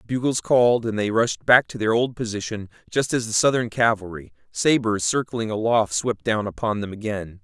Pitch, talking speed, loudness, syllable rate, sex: 110 Hz, 185 wpm, -22 LUFS, 5.1 syllables/s, male